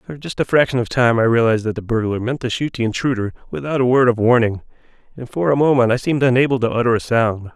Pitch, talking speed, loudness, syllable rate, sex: 120 Hz, 255 wpm, -17 LUFS, 6.6 syllables/s, male